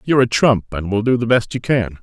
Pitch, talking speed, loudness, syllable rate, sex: 115 Hz, 295 wpm, -17 LUFS, 5.8 syllables/s, male